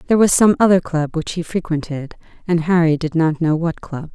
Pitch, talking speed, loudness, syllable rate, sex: 165 Hz, 215 wpm, -17 LUFS, 5.5 syllables/s, female